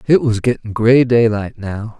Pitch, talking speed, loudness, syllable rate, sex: 115 Hz, 180 wpm, -15 LUFS, 4.4 syllables/s, male